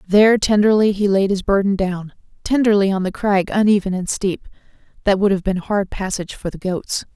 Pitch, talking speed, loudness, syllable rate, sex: 195 Hz, 195 wpm, -18 LUFS, 5.5 syllables/s, female